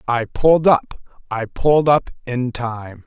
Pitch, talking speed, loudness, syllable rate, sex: 130 Hz, 155 wpm, -18 LUFS, 4.1 syllables/s, male